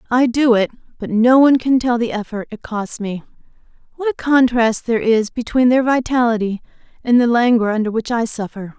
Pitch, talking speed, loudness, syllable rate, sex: 235 Hz, 190 wpm, -17 LUFS, 5.5 syllables/s, female